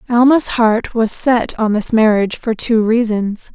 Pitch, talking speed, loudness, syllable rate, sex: 225 Hz, 170 wpm, -15 LUFS, 4.2 syllables/s, female